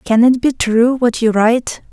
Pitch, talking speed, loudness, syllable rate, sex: 235 Hz, 220 wpm, -14 LUFS, 4.6 syllables/s, female